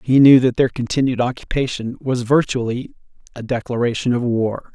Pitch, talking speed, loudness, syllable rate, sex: 125 Hz, 150 wpm, -18 LUFS, 5.2 syllables/s, male